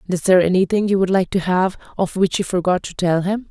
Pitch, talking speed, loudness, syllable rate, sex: 185 Hz, 275 wpm, -18 LUFS, 6.4 syllables/s, female